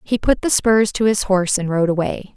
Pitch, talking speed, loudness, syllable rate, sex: 200 Hz, 255 wpm, -17 LUFS, 5.3 syllables/s, female